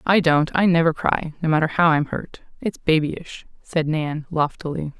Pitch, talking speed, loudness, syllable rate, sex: 160 Hz, 180 wpm, -21 LUFS, 4.6 syllables/s, female